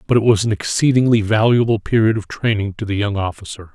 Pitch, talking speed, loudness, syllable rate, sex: 110 Hz, 210 wpm, -17 LUFS, 6.2 syllables/s, male